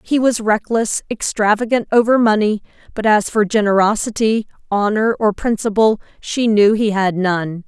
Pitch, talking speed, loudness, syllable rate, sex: 215 Hz, 140 wpm, -16 LUFS, 4.6 syllables/s, female